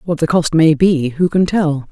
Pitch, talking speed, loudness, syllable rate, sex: 160 Hz, 250 wpm, -14 LUFS, 4.5 syllables/s, female